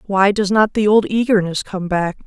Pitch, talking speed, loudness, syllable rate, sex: 200 Hz, 210 wpm, -16 LUFS, 4.7 syllables/s, female